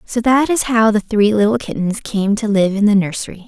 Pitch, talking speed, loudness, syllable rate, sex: 215 Hz, 240 wpm, -15 LUFS, 5.3 syllables/s, female